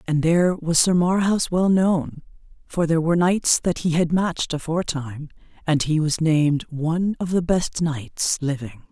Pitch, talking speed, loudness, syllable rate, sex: 165 Hz, 175 wpm, -21 LUFS, 4.9 syllables/s, female